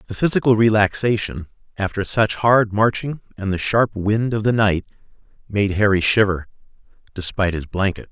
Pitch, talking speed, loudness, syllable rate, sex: 105 Hz, 150 wpm, -19 LUFS, 5.2 syllables/s, male